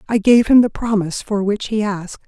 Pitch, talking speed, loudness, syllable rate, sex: 210 Hz, 235 wpm, -16 LUFS, 5.7 syllables/s, female